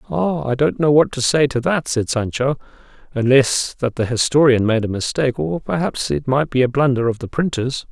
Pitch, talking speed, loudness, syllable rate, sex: 130 Hz, 205 wpm, -18 LUFS, 5.0 syllables/s, male